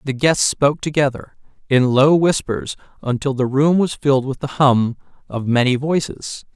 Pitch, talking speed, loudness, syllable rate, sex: 135 Hz, 165 wpm, -17 LUFS, 4.8 syllables/s, male